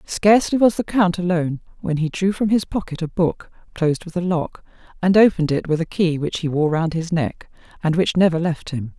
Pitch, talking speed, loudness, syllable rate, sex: 170 Hz, 225 wpm, -20 LUFS, 5.6 syllables/s, female